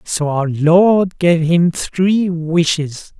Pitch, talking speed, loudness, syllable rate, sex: 170 Hz, 130 wpm, -15 LUFS, 2.6 syllables/s, male